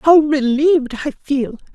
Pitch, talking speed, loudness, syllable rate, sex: 285 Hz, 135 wpm, -16 LUFS, 4.0 syllables/s, female